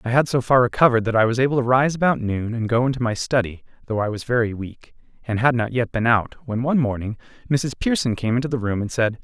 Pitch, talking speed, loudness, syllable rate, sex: 120 Hz, 260 wpm, -21 LUFS, 6.3 syllables/s, male